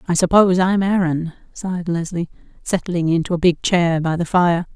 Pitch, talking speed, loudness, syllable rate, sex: 175 Hz, 175 wpm, -18 LUFS, 5.2 syllables/s, female